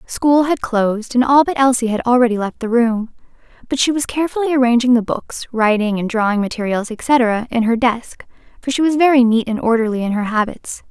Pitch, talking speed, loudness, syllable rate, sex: 240 Hz, 205 wpm, -16 LUFS, 5.5 syllables/s, female